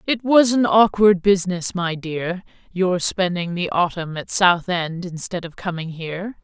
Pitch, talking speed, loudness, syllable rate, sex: 180 Hz, 170 wpm, -20 LUFS, 4.3 syllables/s, female